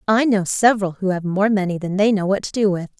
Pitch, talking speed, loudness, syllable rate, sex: 200 Hz, 280 wpm, -19 LUFS, 6.2 syllables/s, female